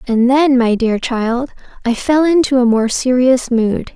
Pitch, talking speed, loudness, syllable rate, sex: 250 Hz, 180 wpm, -14 LUFS, 4.0 syllables/s, female